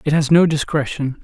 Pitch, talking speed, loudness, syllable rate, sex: 150 Hz, 195 wpm, -17 LUFS, 5.4 syllables/s, male